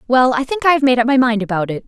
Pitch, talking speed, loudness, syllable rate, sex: 250 Hz, 355 wpm, -15 LUFS, 7.3 syllables/s, female